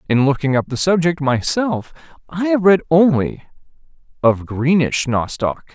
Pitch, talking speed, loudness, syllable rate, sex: 150 Hz, 135 wpm, -17 LUFS, 4.4 syllables/s, male